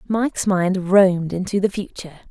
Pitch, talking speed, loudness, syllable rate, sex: 190 Hz, 155 wpm, -19 LUFS, 5.4 syllables/s, female